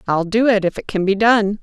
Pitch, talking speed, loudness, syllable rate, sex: 205 Hz, 260 wpm, -17 LUFS, 5.4 syllables/s, female